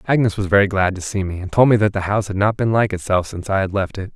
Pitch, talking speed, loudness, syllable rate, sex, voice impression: 100 Hz, 330 wpm, -18 LUFS, 7.0 syllables/s, male, masculine, adult-like, slightly powerful, clear, fluent, slightly cool, refreshing, friendly, lively, kind, slightly modest, light